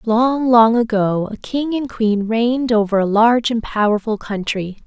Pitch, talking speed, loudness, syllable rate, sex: 225 Hz, 175 wpm, -17 LUFS, 4.5 syllables/s, female